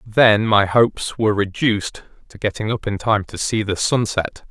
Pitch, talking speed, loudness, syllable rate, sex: 105 Hz, 185 wpm, -19 LUFS, 4.8 syllables/s, male